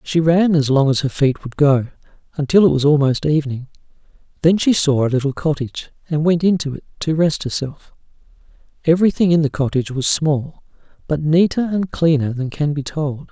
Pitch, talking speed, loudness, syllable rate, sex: 150 Hz, 185 wpm, -17 LUFS, 5.5 syllables/s, male